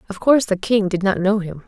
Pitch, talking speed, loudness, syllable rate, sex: 200 Hz, 285 wpm, -18 LUFS, 6.1 syllables/s, female